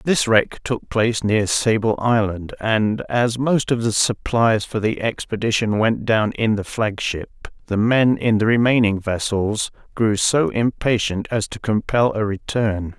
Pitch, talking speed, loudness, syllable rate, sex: 110 Hz, 165 wpm, -19 LUFS, 4.0 syllables/s, male